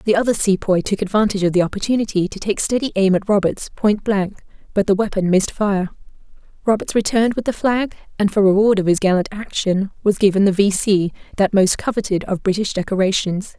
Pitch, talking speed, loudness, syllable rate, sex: 200 Hz, 195 wpm, -18 LUFS, 6.0 syllables/s, female